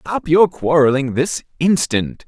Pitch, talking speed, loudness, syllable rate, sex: 150 Hz, 130 wpm, -16 LUFS, 3.9 syllables/s, male